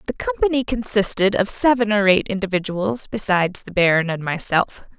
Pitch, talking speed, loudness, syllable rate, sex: 195 Hz, 155 wpm, -19 LUFS, 5.2 syllables/s, female